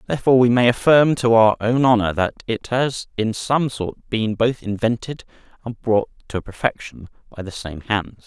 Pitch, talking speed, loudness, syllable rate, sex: 115 Hz, 190 wpm, -19 LUFS, 4.9 syllables/s, male